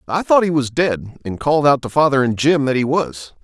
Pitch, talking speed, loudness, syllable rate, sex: 140 Hz, 260 wpm, -17 LUFS, 5.4 syllables/s, male